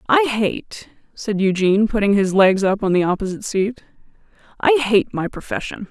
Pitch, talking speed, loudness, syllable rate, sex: 210 Hz, 165 wpm, -18 LUFS, 5.2 syllables/s, female